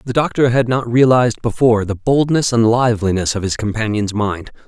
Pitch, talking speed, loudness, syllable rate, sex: 115 Hz, 180 wpm, -16 LUFS, 5.7 syllables/s, male